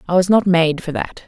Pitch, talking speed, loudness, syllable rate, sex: 175 Hz, 280 wpm, -16 LUFS, 5.6 syllables/s, female